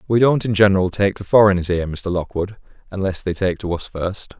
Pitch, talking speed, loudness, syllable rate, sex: 95 Hz, 220 wpm, -19 LUFS, 5.9 syllables/s, male